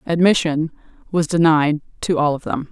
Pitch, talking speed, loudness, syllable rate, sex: 160 Hz, 155 wpm, -18 LUFS, 4.9 syllables/s, female